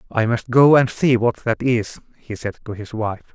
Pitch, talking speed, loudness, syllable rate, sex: 115 Hz, 235 wpm, -19 LUFS, 4.6 syllables/s, male